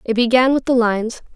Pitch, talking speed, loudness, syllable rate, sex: 240 Hz, 220 wpm, -16 LUFS, 6.0 syllables/s, female